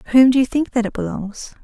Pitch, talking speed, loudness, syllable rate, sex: 240 Hz, 295 wpm, -18 LUFS, 6.8 syllables/s, female